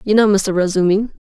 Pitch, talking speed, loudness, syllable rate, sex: 200 Hz, 195 wpm, -15 LUFS, 6.4 syllables/s, female